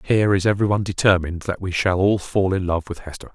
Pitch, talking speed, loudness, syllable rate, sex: 95 Hz, 235 wpm, -20 LUFS, 6.9 syllables/s, male